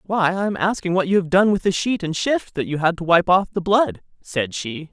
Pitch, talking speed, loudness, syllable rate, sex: 180 Hz, 280 wpm, -20 LUFS, 5.2 syllables/s, male